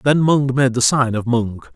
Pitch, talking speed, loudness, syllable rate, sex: 125 Hz, 240 wpm, -16 LUFS, 4.5 syllables/s, male